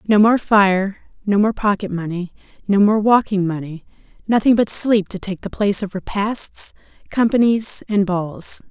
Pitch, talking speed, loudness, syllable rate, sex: 200 Hz, 160 wpm, -18 LUFS, 4.5 syllables/s, female